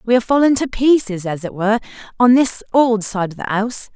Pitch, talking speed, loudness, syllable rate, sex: 225 Hz, 230 wpm, -16 LUFS, 6.2 syllables/s, female